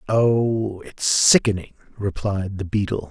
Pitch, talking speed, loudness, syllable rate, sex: 100 Hz, 115 wpm, -21 LUFS, 3.8 syllables/s, male